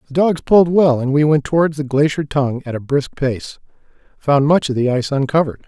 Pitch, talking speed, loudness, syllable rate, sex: 140 Hz, 220 wpm, -16 LUFS, 6.0 syllables/s, male